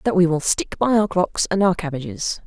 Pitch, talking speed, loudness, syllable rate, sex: 175 Hz, 245 wpm, -20 LUFS, 5.2 syllables/s, female